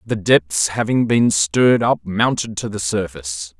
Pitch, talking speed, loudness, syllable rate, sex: 100 Hz, 165 wpm, -18 LUFS, 4.4 syllables/s, male